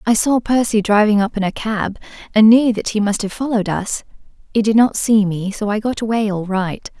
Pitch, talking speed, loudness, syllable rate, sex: 215 Hz, 230 wpm, -17 LUFS, 5.3 syllables/s, female